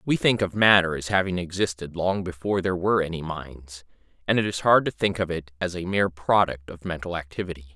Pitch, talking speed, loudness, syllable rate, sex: 90 Hz, 215 wpm, -24 LUFS, 6.1 syllables/s, male